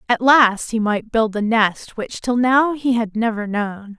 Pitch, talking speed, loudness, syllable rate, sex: 225 Hz, 210 wpm, -18 LUFS, 3.9 syllables/s, female